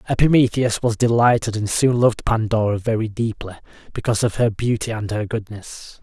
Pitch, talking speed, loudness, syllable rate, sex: 110 Hz, 160 wpm, -19 LUFS, 5.5 syllables/s, male